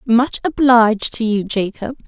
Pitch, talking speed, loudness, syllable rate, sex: 230 Hz, 145 wpm, -16 LUFS, 4.3 syllables/s, female